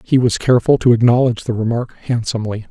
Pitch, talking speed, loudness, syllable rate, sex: 120 Hz, 175 wpm, -16 LUFS, 6.5 syllables/s, male